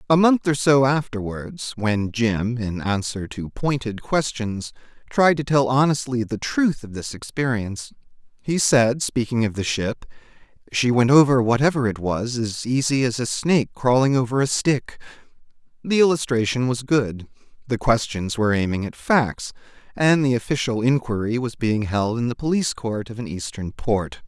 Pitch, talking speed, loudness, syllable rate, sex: 120 Hz, 165 wpm, -21 LUFS, 4.7 syllables/s, male